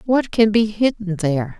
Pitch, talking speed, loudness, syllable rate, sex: 200 Hz, 190 wpm, -18 LUFS, 4.9 syllables/s, female